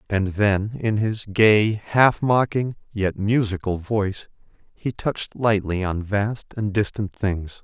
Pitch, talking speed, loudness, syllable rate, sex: 105 Hz, 140 wpm, -22 LUFS, 3.8 syllables/s, male